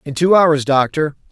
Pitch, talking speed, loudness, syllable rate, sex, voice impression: 150 Hz, 185 wpm, -14 LUFS, 4.6 syllables/s, male, masculine, adult-like, tensed, powerful, hard, clear, intellectual, wild, lively, slightly strict